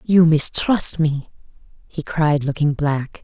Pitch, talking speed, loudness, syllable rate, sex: 155 Hz, 130 wpm, -18 LUFS, 3.5 syllables/s, female